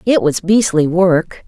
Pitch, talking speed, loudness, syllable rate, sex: 185 Hz, 160 wpm, -14 LUFS, 3.7 syllables/s, female